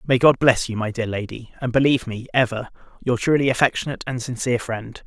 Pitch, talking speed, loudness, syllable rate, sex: 120 Hz, 200 wpm, -21 LUFS, 6.2 syllables/s, male